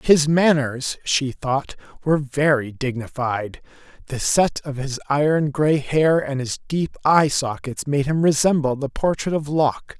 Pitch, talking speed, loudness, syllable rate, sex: 145 Hz, 155 wpm, -20 LUFS, 4.2 syllables/s, male